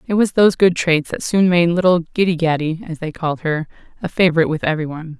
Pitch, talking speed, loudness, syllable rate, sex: 165 Hz, 220 wpm, -17 LUFS, 6.7 syllables/s, female